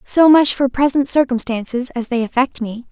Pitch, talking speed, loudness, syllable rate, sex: 255 Hz, 185 wpm, -16 LUFS, 5.1 syllables/s, female